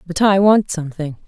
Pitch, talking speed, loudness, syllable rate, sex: 180 Hz, 190 wpm, -16 LUFS, 5.6 syllables/s, female